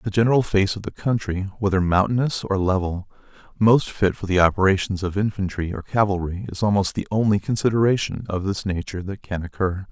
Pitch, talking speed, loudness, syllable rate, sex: 100 Hz, 180 wpm, -22 LUFS, 5.8 syllables/s, male